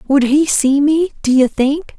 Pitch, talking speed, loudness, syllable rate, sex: 285 Hz, 210 wpm, -14 LUFS, 4.0 syllables/s, female